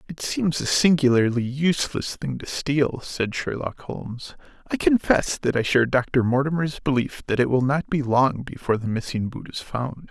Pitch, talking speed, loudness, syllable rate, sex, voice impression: 130 Hz, 185 wpm, -23 LUFS, 4.9 syllables/s, male, very masculine, old, very thick, slightly tensed, very powerful, bright, soft, muffled, slightly fluent, very raspy, slightly cool, intellectual, slightly refreshing, sincere, very calm, very mature, slightly friendly, reassuring, very unique, slightly elegant, very wild, sweet, lively, kind, slightly modest